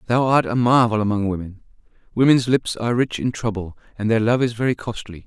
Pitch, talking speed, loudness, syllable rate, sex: 115 Hz, 205 wpm, -20 LUFS, 6.0 syllables/s, male